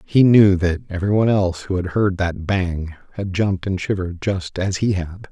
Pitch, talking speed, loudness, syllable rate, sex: 95 Hz, 215 wpm, -19 LUFS, 5.3 syllables/s, male